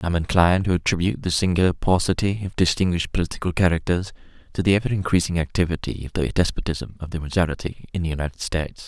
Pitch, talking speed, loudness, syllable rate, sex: 85 Hz, 180 wpm, -22 LUFS, 7.0 syllables/s, male